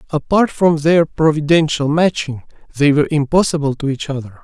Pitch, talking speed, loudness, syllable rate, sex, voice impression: 150 Hz, 150 wpm, -15 LUFS, 5.4 syllables/s, male, masculine, adult-like, slightly thick, slightly relaxed, soft, slightly muffled, slightly raspy, cool, intellectual, calm, mature, friendly, wild, lively, slightly intense